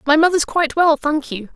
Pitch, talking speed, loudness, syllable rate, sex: 300 Hz, 230 wpm, -16 LUFS, 5.8 syllables/s, female